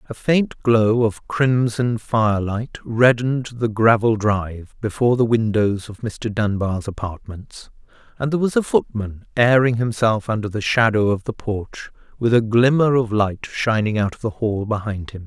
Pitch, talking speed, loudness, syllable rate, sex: 110 Hz, 165 wpm, -19 LUFS, 4.5 syllables/s, male